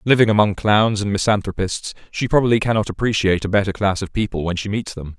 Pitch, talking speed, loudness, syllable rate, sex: 105 Hz, 210 wpm, -19 LUFS, 6.3 syllables/s, male